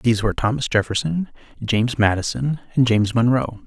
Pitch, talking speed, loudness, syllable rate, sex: 120 Hz, 145 wpm, -20 LUFS, 6.1 syllables/s, male